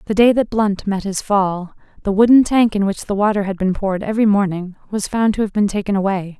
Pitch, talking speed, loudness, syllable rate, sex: 200 Hz, 245 wpm, -17 LUFS, 5.9 syllables/s, female